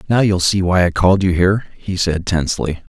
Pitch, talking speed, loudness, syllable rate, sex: 90 Hz, 225 wpm, -16 LUFS, 5.8 syllables/s, male